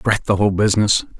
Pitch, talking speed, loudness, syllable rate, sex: 100 Hz, 200 wpm, -17 LUFS, 7.0 syllables/s, male